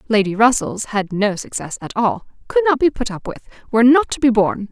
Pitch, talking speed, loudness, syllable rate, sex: 235 Hz, 230 wpm, -17 LUFS, 5.7 syllables/s, female